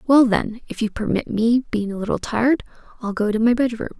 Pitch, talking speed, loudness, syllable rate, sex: 230 Hz, 240 wpm, -21 LUFS, 5.8 syllables/s, female